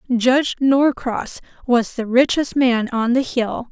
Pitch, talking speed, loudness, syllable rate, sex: 250 Hz, 145 wpm, -18 LUFS, 3.9 syllables/s, female